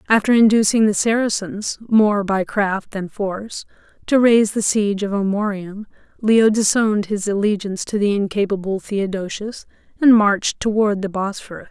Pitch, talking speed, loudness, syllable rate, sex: 205 Hz, 145 wpm, -18 LUFS, 5.0 syllables/s, female